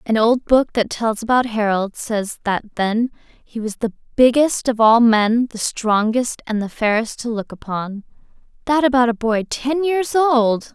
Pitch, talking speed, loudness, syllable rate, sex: 235 Hz, 180 wpm, -18 LUFS, 4.2 syllables/s, female